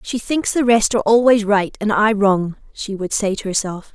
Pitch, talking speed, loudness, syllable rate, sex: 210 Hz, 230 wpm, -17 LUFS, 4.9 syllables/s, female